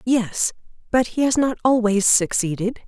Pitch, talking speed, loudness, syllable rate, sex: 225 Hz, 125 wpm, -20 LUFS, 4.4 syllables/s, female